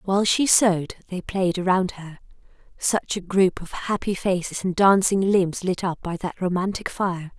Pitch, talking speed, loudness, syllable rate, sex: 185 Hz, 180 wpm, -22 LUFS, 4.6 syllables/s, female